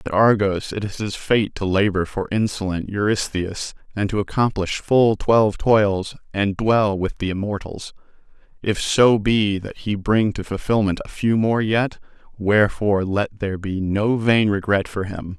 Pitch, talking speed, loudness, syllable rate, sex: 100 Hz, 170 wpm, -20 LUFS, 4.5 syllables/s, male